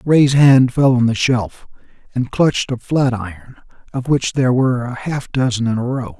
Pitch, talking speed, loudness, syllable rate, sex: 125 Hz, 205 wpm, -16 LUFS, 5.0 syllables/s, male